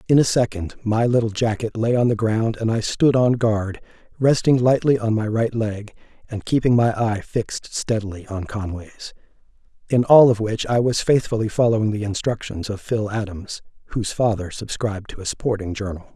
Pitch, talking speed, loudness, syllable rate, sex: 110 Hz, 180 wpm, -21 LUFS, 5.3 syllables/s, male